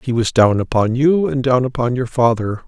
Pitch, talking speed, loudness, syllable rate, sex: 125 Hz, 225 wpm, -16 LUFS, 5.1 syllables/s, male